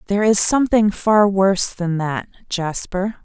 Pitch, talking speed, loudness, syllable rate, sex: 200 Hz, 150 wpm, -17 LUFS, 4.7 syllables/s, female